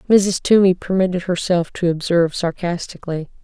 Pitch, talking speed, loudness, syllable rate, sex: 180 Hz, 120 wpm, -18 LUFS, 5.5 syllables/s, female